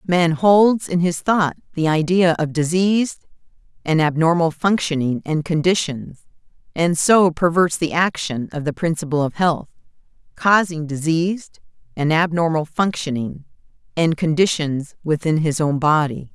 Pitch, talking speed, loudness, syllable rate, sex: 165 Hz, 130 wpm, -19 LUFS, 4.5 syllables/s, female